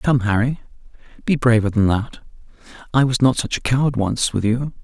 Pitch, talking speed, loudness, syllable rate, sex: 120 Hz, 185 wpm, -19 LUFS, 5.4 syllables/s, male